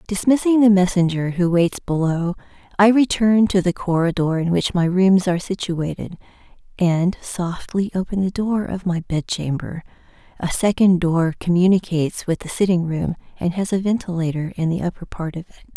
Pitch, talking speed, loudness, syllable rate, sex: 180 Hz, 170 wpm, -19 LUFS, 5.1 syllables/s, female